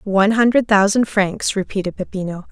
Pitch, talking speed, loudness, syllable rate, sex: 205 Hz, 145 wpm, -17 LUFS, 5.4 syllables/s, female